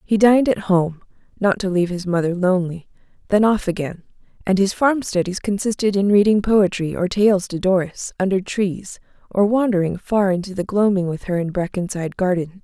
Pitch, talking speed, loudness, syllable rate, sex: 190 Hz, 180 wpm, -19 LUFS, 5.4 syllables/s, female